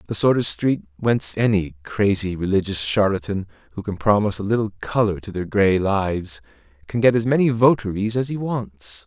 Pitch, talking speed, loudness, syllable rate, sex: 100 Hz, 180 wpm, -21 LUFS, 5.3 syllables/s, male